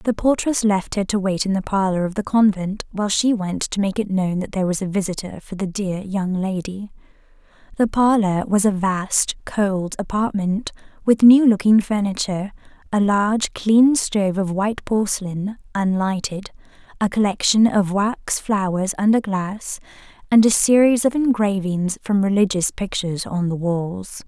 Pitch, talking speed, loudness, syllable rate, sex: 200 Hz, 165 wpm, -19 LUFS, 4.7 syllables/s, female